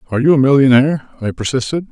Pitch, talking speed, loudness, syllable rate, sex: 135 Hz, 190 wpm, -13 LUFS, 7.8 syllables/s, male